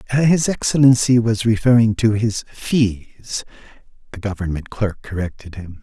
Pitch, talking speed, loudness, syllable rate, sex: 110 Hz, 125 wpm, -18 LUFS, 4.4 syllables/s, male